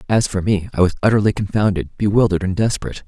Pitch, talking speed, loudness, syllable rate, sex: 100 Hz, 195 wpm, -18 LUFS, 7.4 syllables/s, male